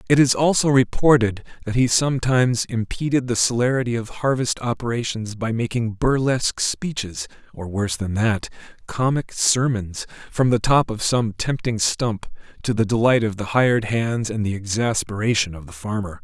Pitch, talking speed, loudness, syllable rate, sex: 115 Hz, 160 wpm, -21 LUFS, 5.0 syllables/s, male